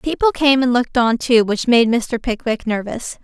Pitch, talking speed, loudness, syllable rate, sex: 240 Hz, 205 wpm, -17 LUFS, 4.8 syllables/s, female